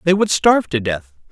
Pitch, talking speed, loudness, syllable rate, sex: 150 Hz, 230 wpm, -16 LUFS, 5.8 syllables/s, male